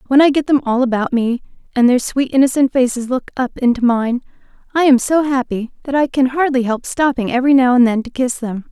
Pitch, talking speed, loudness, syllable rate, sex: 255 Hz, 225 wpm, -16 LUFS, 5.8 syllables/s, female